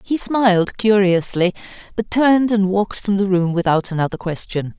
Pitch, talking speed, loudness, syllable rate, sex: 195 Hz, 165 wpm, -17 LUFS, 5.2 syllables/s, female